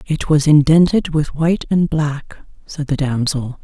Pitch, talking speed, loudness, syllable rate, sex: 150 Hz, 165 wpm, -16 LUFS, 4.6 syllables/s, female